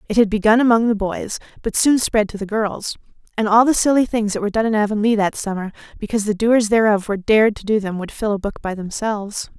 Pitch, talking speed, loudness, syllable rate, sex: 215 Hz, 245 wpm, -18 LUFS, 6.3 syllables/s, female